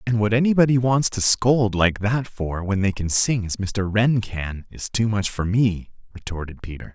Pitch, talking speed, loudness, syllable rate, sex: 105 Hz, 205 wpm, -21 LUFS, 4.6 syllables/s, male